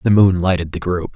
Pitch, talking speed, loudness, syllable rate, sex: 90 Hz, 260 wpm, -17 LUFS, 5.7 syllables/s, male